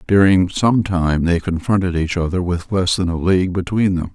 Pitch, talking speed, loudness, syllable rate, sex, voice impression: 90 Hz, 205 wpm, -17 LUFS, 5.0 syllables/s, male, very masculine, very adult-like, slightly old, very thick, slightly relaxed, very powerful, slightly dark, slightly hard, muffled, fluent, very cool, very intellectual, very sincere, very calm, very mature, friendly, very reassuring, slightly unique, very elegant, wild, slightly sweet, kind, slightly modest